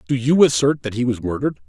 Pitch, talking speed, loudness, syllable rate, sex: 130 Hz, 250 wpm, -18 LUFS, 6.8 syllables/s, male